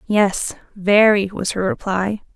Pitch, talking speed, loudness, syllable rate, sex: 200 Hz, 130 wpm, -18 LUFS, 3.6 syllables/s, female